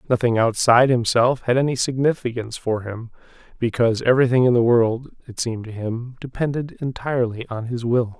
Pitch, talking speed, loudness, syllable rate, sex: 120 Hz, 160 wpm, -20 LUFS, 5.8 syllables/s, male